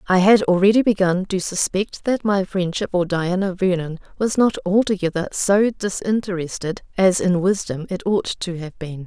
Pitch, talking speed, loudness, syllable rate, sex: 190 Hz, 165 wpm, -20 LUFS, 4.7 syllables/s, female